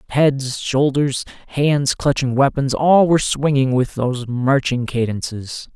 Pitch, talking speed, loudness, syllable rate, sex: 135 Hz, 125 wpm, -18 LUFS, 4.1 syllables/s, male